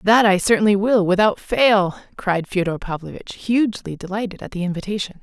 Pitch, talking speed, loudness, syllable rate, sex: 200 Hz, 160 wpm, -19 LUFS, 5.7 syllables/s, female